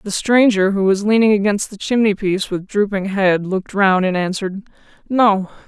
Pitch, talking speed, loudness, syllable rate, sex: 200 Hz, 170 wpm, -17 LUFS, 5.2 syllables/s, female